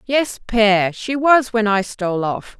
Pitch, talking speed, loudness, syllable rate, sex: 220 Hz, 185 wpm, -17 LUFS, 4.2 syllables/s, female